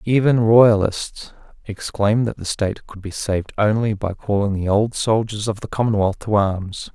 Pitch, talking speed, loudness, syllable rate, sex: 105 Hz, 175 wpm, -19 LUFS, 4.8 syllables/s, male